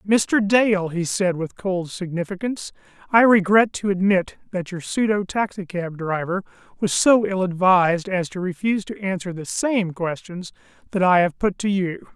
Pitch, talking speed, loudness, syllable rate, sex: 190 Hz, 170 wpm, -21 LUFS, 4.7 syllables/s, male